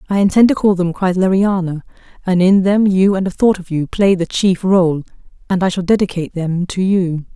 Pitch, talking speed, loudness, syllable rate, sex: 185 Hz, 210 wpm, -15 LUFS, 5.3 syllables/s, female